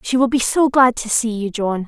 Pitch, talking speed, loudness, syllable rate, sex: 235 Hz, 290 wpm, -17 LUFS, 5.1 syllables/s, female